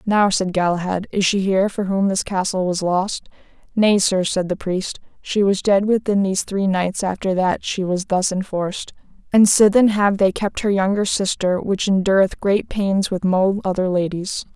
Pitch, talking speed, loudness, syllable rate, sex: 195 Hz, 190 wpm, -19 LUFS, 4.7 syllables/s, female